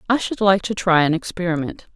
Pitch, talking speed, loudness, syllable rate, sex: 185 Hz, 215 wpm, -19 LUFS, 5.8 syllables/s, female